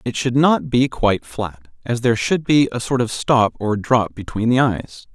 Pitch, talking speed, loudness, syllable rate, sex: 120 Hz, 220 wpm, -18 LUFS, 4.6 syllables/s, male